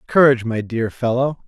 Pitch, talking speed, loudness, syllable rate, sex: 120 Hz, 165 wpm, -18 LUFS, 5.3 syllables/s, male